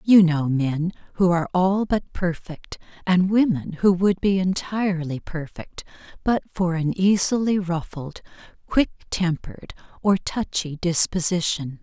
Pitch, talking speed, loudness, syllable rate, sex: 175 Hz, 125 wpm, -22 LUFS, 4.2 syllables/s, female